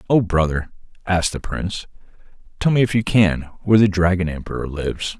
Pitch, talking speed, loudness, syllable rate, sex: 95 Hz, 175 wpm, -19 LUFS, 5.8 syllables/s, male